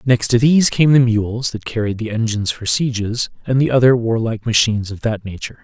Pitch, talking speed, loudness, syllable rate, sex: 115 Hz, 215 wpm, -17 LUFS, 6.0 syllables/s, male